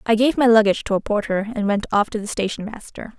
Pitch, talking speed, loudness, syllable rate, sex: 215 Hz, 265 wpm, -20 LUFS, 6.5 syllables/s, female